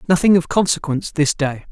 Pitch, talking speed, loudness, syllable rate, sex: 165 Hz, 175 wpm, -17 LUFS, 6.3 syllables/s, male